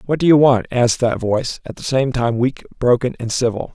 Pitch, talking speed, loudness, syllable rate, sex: 125 Hz, 240 wpm, -17 LUFS, 5.6 syllables/s, male